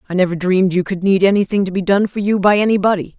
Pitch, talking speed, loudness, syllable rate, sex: 190 Hz, 265 wpm, -15 LUFS, 7.0 syllables/s, female